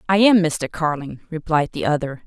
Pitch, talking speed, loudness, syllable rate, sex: 165 Hz, 185 wpm, -20 LUFS, 5.2 syllables/s, female